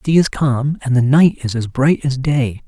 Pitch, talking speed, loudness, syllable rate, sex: 135 Hz, 270 wpm, -16 LUFS, 4.9 syllables/s, male